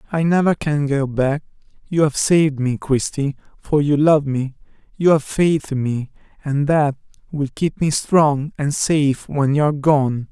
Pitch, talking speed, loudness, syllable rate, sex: 145 Hz, 180 wpm, -18 LUFS, 4.4 syllables/s, male